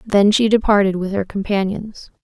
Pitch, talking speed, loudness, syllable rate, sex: 200 Hz, 160 wpm, -17 LUFS, 4.9 syllables/s, female